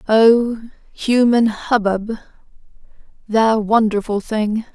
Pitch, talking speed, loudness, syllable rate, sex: 220 Hz, 75 wpm, -17 LUFS, 3.5 syllables/s, female